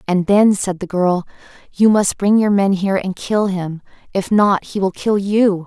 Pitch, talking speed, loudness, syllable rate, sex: 195 Hz, 210 wpm, -16 LUFS, 4.4 syllables/s, female